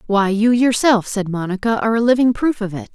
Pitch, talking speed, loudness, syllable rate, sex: 220 Hz, 225 wpm, -17 LUFS, 5.8 syllables/s, female